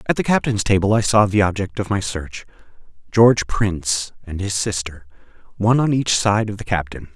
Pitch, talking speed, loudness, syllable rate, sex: 100 Hz, 195 wpm, -19 LUFS, 5.4 syllables/s, male